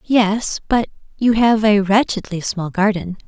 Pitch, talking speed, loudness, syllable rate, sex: 205 Hz, 145 wpm, -17 LUFS, 4.0 syllables/s, female